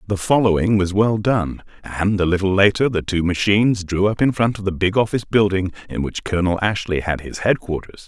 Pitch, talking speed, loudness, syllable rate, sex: 100 Hz, 210 wpm, -19 LUFS, 5.6 syllables/s, male